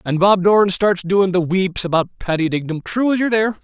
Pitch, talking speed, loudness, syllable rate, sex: 190 Hz, 230 wpm, -17 LUFS, 5.9 syllables/s, male